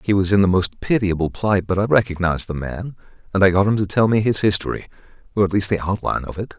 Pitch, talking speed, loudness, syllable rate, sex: 100 Hz, 255 wpm, -19 LUFS, 6.6 syllables/s, male